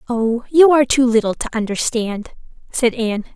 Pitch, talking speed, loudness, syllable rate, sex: 240 Hz, 160 wpm, -17 LUFS, 5.4 syllables/s, female